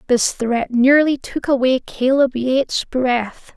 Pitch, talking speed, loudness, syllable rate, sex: 255 Hz, 135 wpm, -17 LUFS, 3.7 syllables/s, female